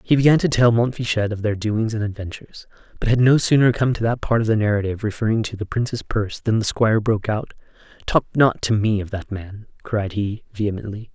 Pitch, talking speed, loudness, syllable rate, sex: 110 Hz, 220 wpm, -20 LUFS, 6.1 syllables/s, male